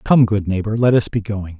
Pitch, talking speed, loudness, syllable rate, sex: 105 Hz, 265 wpm, -17 LUFS, 5.4 syllables/s, male